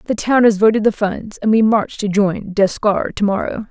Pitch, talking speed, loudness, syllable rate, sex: 210 Hz, 210 wpm, -16 LUFS, 4.7 syllables/s, female